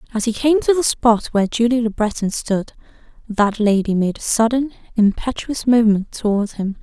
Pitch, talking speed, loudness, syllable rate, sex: 225 Hz, 175 wpm, -18 LUFS, 5.2 syllables/s, female